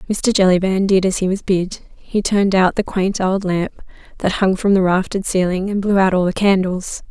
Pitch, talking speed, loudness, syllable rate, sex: 190 Hz, 210 wpm, -17 LUFS, 5.4 syllables/s, female